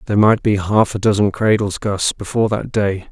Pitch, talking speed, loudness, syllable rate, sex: 105 Hz, 210 wpm, -17 LUFS, 5.5 syllables/s, male